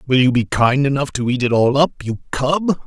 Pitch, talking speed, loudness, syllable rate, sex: 135 Hz, 250 wpm, -17 LUFS, 5.1 syllables/s, male